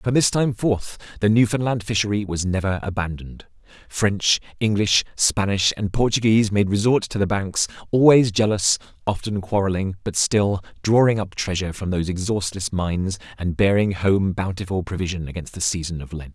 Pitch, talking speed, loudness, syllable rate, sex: 100 Hz, 160 wpm, -21 LUFS, 5.3 syllables/s, male